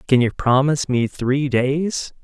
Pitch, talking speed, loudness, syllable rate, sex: 135 Hz, 160 wpm, -19 LUFS, 4.2 syllables/s, male